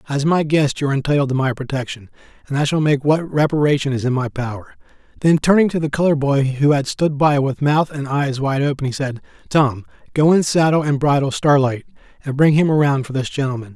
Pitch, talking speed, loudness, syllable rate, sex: 140 Hz, 225 wpm, -18 LUFS, 6.0 syllables/s, male